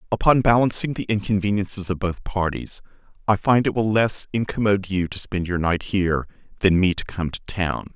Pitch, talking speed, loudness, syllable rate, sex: 100 Hz, 190 wpm, -22 LUFS, 5.4 syllables/s, male